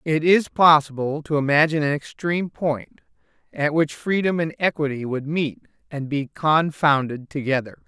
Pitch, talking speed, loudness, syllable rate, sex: 150 Hz, 145 wpm, -21 LUFS, 5.0 syllables/s, male